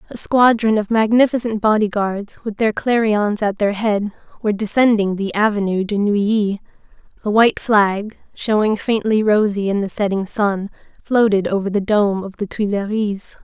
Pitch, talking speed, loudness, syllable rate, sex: 210 Hz, 155 wpm, -18 LUFS, 4.8 syllables/s, female